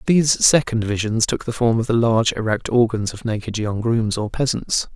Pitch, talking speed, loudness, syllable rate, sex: 115 Hz, 205 wpm, -19 LUFS, 5.3 syllables/s, male